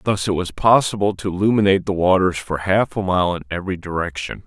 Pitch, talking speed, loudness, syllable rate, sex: 95 Hz, 200 wpm, -19 LUFS, 6.1 syllables/s, male